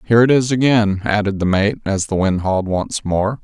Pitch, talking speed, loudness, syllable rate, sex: 105 Hz, 225 wpm, -17 LUFS, 5.2 syllables/s, male